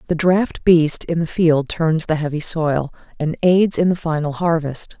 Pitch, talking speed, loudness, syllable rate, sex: 160 Hz, 190 wpm, -18 LUFS, 4.2 syllables/s, female